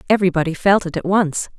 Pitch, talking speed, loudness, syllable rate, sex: 185 Hz, 190 wpm, -18 LUFS, 6.8 syllables/s, female